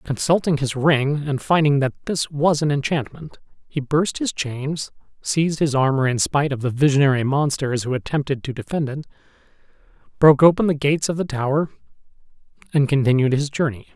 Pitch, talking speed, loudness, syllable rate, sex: 145 Hz, 170 wpm, -20 LUFS, 5.6 syllables/s, male